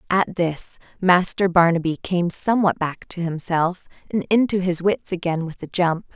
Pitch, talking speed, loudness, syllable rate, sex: 175 Hz, 165 wpm, -21 LUFS, 4.6 syllables/s, female